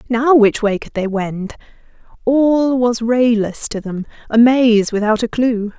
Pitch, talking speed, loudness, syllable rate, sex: 230 Hz, 155 wpm, -15 LUFS, 3.9 syllables/s, female